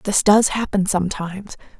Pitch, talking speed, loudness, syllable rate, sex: 195 Hz, 135 wpm, -19 LUFS, 5.1 syllables/s, female